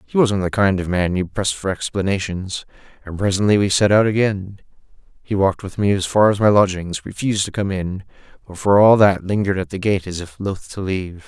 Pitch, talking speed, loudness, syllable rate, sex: 95 Hz, 225 wpm, -18 LUFS, 5.7 syllables/s, male